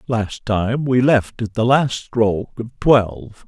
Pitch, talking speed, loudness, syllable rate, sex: 115 Hz, 175 wpm, -18 LUFS, 3.6 syllables/s, male